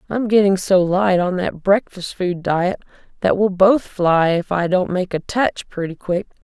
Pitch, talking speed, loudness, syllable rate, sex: 185 Hz, 195 wpm, -18 LUFS, 4.3 syllables/s, female